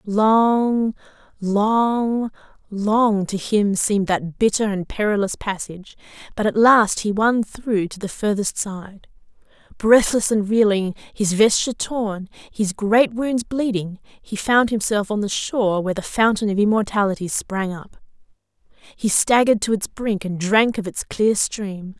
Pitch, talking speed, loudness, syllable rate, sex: 210 Hz, 150 wpm, -20 LUFS, 4.1 syllables/s, female